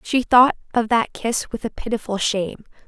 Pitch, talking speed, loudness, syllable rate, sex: 230 Hz, 190 wpm, -20 LUFS, 5.2 syllables/s, female